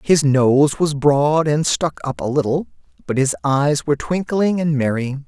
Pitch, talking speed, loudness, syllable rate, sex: 140 Hz, 180 wpm, -18 LUFS, 4.3 syllables/s, male